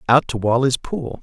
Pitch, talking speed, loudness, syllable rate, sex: 130 Hz, 195 wpm, -19 LUFS, 4.8 syllables/s, male